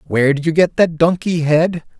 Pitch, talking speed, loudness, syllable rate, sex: 165 Hz, 210 wpm, -15 LUFS, 5.2 syllables/s, male